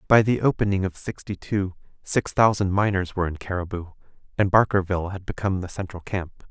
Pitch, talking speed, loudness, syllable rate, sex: 95 Hz, 175 wpm, -24 LUFS, 6.0 syllables/s, male